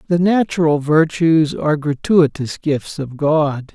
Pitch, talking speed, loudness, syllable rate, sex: 155 Hz, 130 wpm, -16 LUFS, 4.0 syllables/s, male